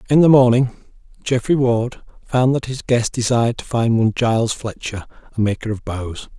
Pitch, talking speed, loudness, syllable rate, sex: 120 Hz, 180 wpm, -18 LUFS, 5.3 syllables/s, male